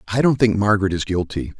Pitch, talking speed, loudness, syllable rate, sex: 100 Hz, 225 wpm, -19 LUFS, 6.4 syllables/s, male